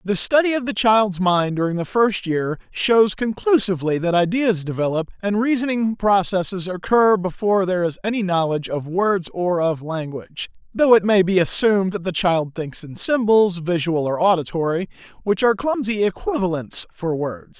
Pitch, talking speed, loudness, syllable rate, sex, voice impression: 190 Hz, 165 wpm, -20 LUFS, 5.0 syllables/s, male, masculine, adult-like, slightly unique, intense